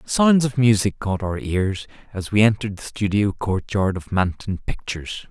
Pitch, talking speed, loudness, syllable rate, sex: 105 Hz, 170 wpm, -21 LUFS, 4.7 syllables/s, male